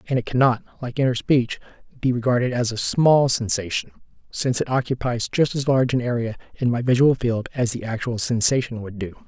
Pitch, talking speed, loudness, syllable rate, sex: 120 Hz, 195 wpm, -22 LUFS, 5.8 syllables/s, male